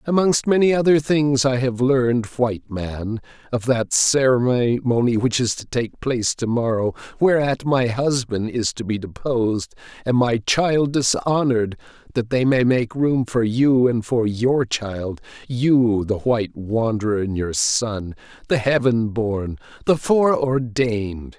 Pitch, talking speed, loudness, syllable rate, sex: 120 Hz, 150 wpm, -20 LUFS, 4.1 syllables/s, male